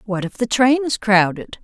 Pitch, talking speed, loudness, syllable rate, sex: 225 Hz, 220 wpm, -17 LUFS, 4.7 syllables/s, female